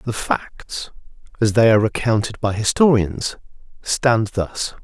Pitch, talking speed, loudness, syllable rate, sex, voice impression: 110 Hz, 125 wpm, -19 LUFS, 3.9 syllables/s, male, masculine, adult-like, slightly refreshing, sincere, slightly calm, slightly kind